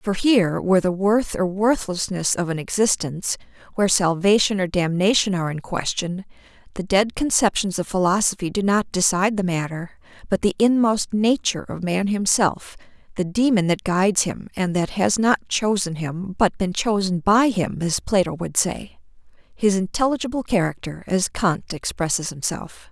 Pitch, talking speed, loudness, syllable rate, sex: 195 Hz, 160 wpm, -21 LUFS, 4.9 syllables/s, female